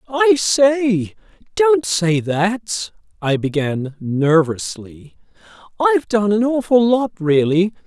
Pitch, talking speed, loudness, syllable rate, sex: 200 Hz, 105 wpm, -17 LUFS, 3.3 syllables/s, male